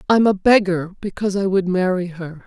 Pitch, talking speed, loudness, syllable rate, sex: 190 Hz, 195 wpm, -18 LUFS, 5.5 syllables/s, female